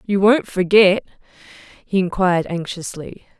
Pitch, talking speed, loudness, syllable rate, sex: 190 Hz, 105 wpm, -18 LUFS, 4.5 syllables/s, female